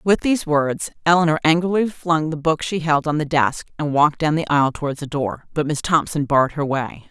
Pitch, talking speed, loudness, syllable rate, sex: 155 Hz, 230 wpm, -19 LUFS, 5.5 syllables/s, female